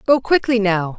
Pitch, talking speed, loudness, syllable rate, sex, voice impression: 220 Hz, 185 wpm, -17 LUFS, 4.8 syllables/s, female, feminine, adult-like, tensed, powerful, bright, clear, intellectual, friendly, elegant, lively, kind